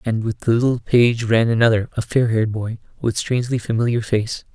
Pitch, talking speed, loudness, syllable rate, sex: 115 Hz, 200 wpm, -19 LUFS, 5.6 syllables/s, male